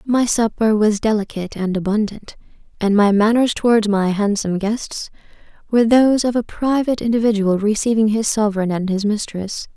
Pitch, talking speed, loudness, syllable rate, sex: 215 Hz, 155 wpm, -18 LUFS, 5.5 syllables/s, female